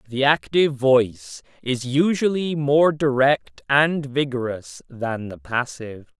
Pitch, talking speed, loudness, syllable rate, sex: 135 Hz, 115 wpm, -21 LUFS, 3.9 syllables/s, male